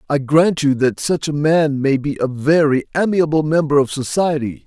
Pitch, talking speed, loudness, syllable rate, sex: 145 Hz, 195 wpm, -17 LUFS, 4.8 syllables/s, male